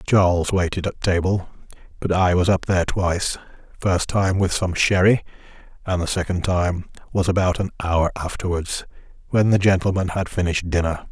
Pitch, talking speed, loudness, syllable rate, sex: 90 Hz, 155 wpm, -21 LUFS, 5.3 syllables/s, male